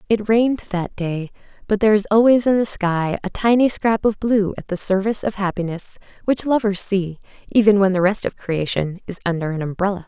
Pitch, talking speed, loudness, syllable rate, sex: 200 Hz, 205 wpm, -19 LUFS, 5.5 syllables/s, female